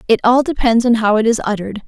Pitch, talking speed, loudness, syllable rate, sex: 230 Hz, 255 wpm, -15 LUFS, 7.0 syllables/s, female